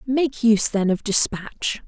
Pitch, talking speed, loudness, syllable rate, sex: 225 Hz, 160 wpm, -20 LUFS, 4.1 syllables/s, female